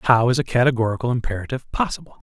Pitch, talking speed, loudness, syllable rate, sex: 125 Hz, 160 wpm, -21 LUFS, 7.3 syllables/s, male